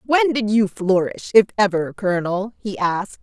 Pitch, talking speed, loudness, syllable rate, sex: 205 Hz, 165 wpm, -19 LUFS, 4.8 syllables/s, female